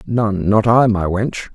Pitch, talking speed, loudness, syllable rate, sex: 105 Hz, 155 wpm, -16 LUFS, 3.7 syllables/s, male